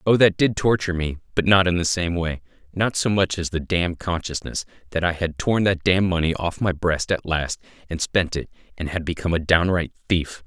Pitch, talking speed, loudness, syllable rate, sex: 90 Hz, 225 wpm, -22 LUFS, 5.6 syllables/s, male